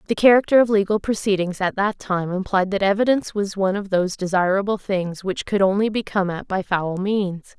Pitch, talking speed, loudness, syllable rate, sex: 195 Hz, 205 wpm, -20 LUFS, 5.6 syllables/s, female